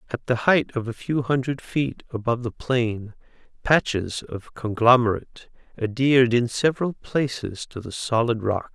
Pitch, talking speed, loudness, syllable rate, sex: 125 Hz, 150 wpm, -23 LUFS, 4.7 syllables/s, male